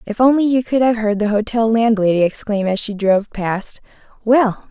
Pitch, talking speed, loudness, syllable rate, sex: 220 Hz, 190 wpm, -16 LUFS, 5.1 syllables/s, female